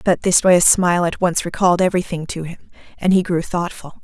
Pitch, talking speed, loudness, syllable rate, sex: 175 Hz, 210 wpm, -17 LUFS, 6.0 syllables/s, female